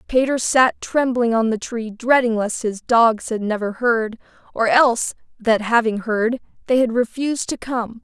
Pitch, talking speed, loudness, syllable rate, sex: 235 Hz, 170 wpm, -19 LUFS, 4.5 syllables/s, female